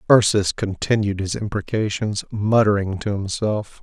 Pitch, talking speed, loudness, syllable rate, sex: 105 Hz, 110 wpm, -21 LUFS, 4.5 syllables/s, male